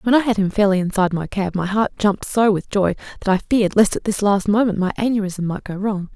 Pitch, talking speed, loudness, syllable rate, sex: 200 Hz, 265 wpm, -19 LUFS, 6.2 syllables/s, female